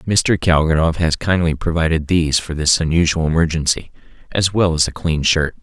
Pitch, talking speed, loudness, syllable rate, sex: 80 Hz, 170 wpm, -17 LUFS, 5.2 syllables/s, male